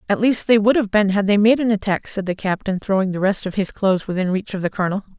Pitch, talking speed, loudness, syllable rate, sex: 200 Hz, 290 wpm, -19 LUFS, 6.5 syllables/s, female